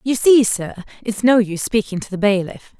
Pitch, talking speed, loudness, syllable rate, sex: 215 Hz, 215 wpm, -17 LUFS, 5.2 syllables/s, female